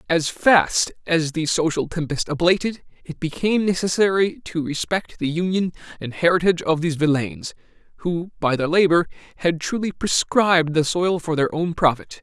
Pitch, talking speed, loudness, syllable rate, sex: 170 Hz, 155 wpm, -21 LUFS, 5.1 syllables/s, male